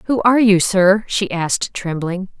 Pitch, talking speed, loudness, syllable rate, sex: 195 Hz, 175 wpm, -16 LUFS, 4.5 syllables/s, female